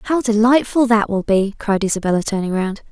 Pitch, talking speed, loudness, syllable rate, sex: 215 Hz, 185 wpm, -17 LUFS, 5.4 syllables/s, female